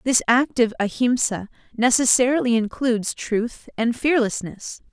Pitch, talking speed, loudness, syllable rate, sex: 240 Hz, 100 wpm, -20 LUFS, 4.8 syllables/s, female